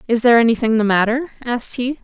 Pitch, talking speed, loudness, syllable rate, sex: 235 Hz, 205 wpm, -16 LUFS, 7.0 syllables/s, female